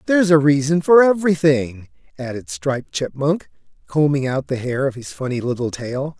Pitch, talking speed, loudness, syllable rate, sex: 140 Hz, 165 wpm, -19 LUFS, 5.2 syllables/s, male